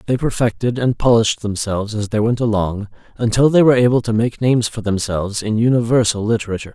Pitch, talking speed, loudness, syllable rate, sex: 115 Hz, 185 wpm, -17 LUFS, 6.5 syllables/s, male